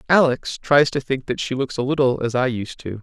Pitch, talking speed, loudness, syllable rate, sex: 130 Hz, 260 wpm, -20 LUFS, 5.3 syllables/s, male